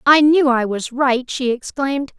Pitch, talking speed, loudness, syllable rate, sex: 265 Hz, 190 wpm, -17 LUFS, 4.5 syllables/s, female